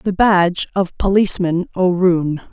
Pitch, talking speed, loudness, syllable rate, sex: 180 Hz, 120 wpm, -16 LUFS, 4.4 syllables/s, female